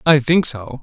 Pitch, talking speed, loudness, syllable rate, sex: 140 Hz, 220 wpm, -16 LUFS, 4.2 syllables/s, male